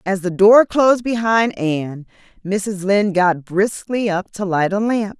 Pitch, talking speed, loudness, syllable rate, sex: 200 Hz, 175 wpm, -17 LUFS, 4.3 syllables/s, female